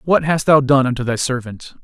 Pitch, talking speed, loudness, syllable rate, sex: 135 Hz, 230 wpm, -16 LUFS, 5.4 syllables/s, male